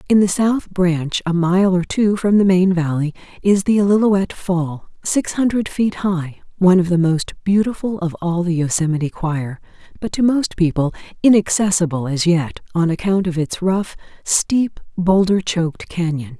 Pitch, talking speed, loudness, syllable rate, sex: 180 Hz, 170 wpm, -18 LUFS, 4.6 syllables/s, female